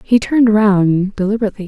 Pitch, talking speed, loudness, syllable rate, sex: 205 Hz, 145 wpm, -14 LUFS, 6.2 syllables/s, female